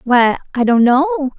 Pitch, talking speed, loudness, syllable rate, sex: 270 Hz, 175 wpm, -14 LUFS, 3.7 syllables/s, female